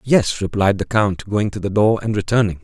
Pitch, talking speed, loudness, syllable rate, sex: 105 Hz, 225 wpm, -18 LUFS, 5.1 syllables/s, male